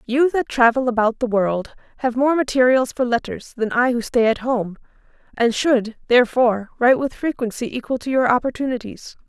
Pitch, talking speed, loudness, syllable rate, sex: 240 Hz, 175 wpm, -19 LUFS, 5.4 syllables/s, female